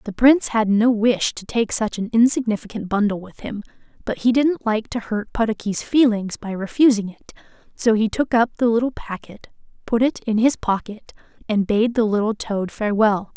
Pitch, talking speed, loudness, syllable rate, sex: 220 Hz, 190 wpm, -20 LUFS, 5.2 syllables/s, female